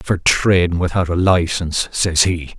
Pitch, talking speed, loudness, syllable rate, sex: 90 Hz, 160 wpm, -16 LUFS, 4.5 syllables/s, male